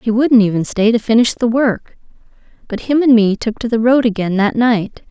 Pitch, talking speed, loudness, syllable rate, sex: 230 Hz, 225 wpm, -14 LUFS, 5.2 syllables/s, female